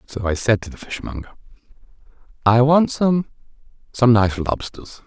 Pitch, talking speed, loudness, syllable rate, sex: 115 Hz, 130 wpm, -19 LUFS, 4.7 syllables/s, male